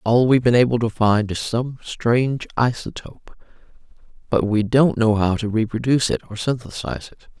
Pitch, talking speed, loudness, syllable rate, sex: 115 Hz, 170 wpm, -20 LUFS, 5.6 syllables/s, female